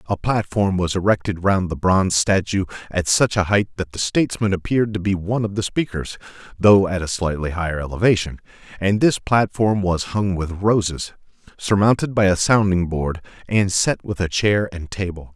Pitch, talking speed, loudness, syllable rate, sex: 95 Hz, 185 wpm, -20 LUFS, 5.2 syllables/s, male